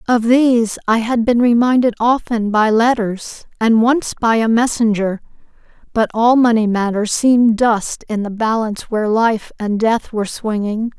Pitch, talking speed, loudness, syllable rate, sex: 225 Hz, 160 wpm, -15 LUFS, 4.6 syllables/s, female